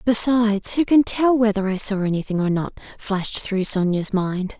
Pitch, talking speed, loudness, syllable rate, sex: 210 Hz, 185 wpm, -19 LUFS, 5.0 syllables/s, female